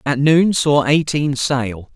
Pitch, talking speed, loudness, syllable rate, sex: 140 Hz, 155 wpm, -16 LUFS, 3.3 syllables/s, male